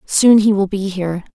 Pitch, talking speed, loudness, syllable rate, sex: 200 Hz, 225 wpm, -15 LUFS, 5.1 syllables/s, female